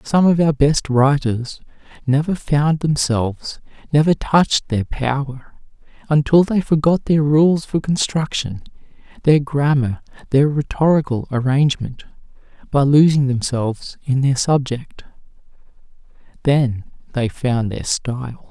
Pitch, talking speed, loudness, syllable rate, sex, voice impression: 140 Hz, 115 wpm, -18 LUFS, 4.2 syllables/s, male, masculine, adult-like, slightly relaxed, slightly weak, soft, intellectual, reassuring, kind, modest